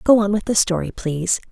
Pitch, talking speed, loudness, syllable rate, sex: 195 Hz, 240 wpm, -19 LUFS, 6.1 syllables/s, female